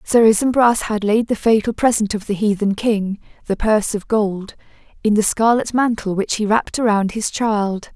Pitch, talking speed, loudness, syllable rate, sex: 215 Hz, 190 wpm, -18 LUFS, 5.0 syllables/s, female